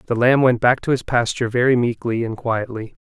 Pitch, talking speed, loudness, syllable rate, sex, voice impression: 120 Hz, 220 wpm, -19 LUFS, 5.7 syllables/s, male, very masculine, adult-like, slightly cool, sincere, slightly friendly